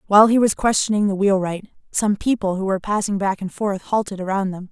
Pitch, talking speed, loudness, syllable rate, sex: 200 Hz, 215 wpm, -20 LUFS, 6.0 syllables/s, female